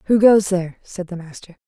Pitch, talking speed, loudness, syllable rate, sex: 190 Hz, 215 wpm, -17 LUFS, 5.8 syllables/s, female